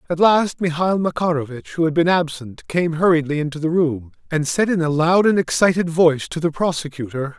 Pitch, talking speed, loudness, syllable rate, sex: 160 Hz, 195 wpm, -19 LUFS, 5.5 syllables/s, male